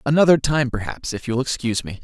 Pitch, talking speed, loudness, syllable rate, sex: 125 Hz, 205 wpm, -20 LUFS, 6.4 syllables/s, male